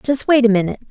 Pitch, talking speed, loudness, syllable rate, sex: 240 Hz, 265 wpm, -15 LUFS, 8.1 syllables/s, female